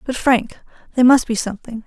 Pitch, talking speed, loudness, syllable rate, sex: 235 Hz, 195 wpm, -17 LUFS, 6.2 syllables/s, female